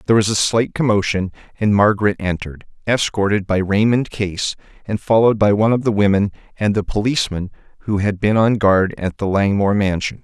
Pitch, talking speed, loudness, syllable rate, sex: 105 Hz, 180 wpm, -17 LUFS, 5.8 syllables/s, male